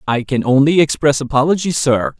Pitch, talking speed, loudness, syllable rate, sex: 140 Hz, 165 wpm, -15 LUFS, 5.5 syllables/s, male